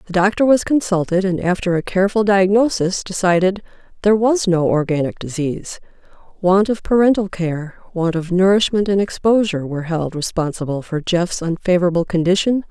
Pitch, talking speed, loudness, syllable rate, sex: 185 Hz, 145 wpm, -17 LUFS, 5.5 syllables/s, female